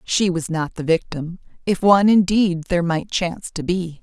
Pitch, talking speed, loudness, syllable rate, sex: 175 Hz, 195 wpm, -19 LUFS, 5.0 syllables/s, female